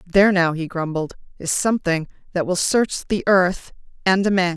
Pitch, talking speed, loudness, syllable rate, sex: 180 Hz, 185 wpm, -20 LUFS, 4.9 syllables/s, female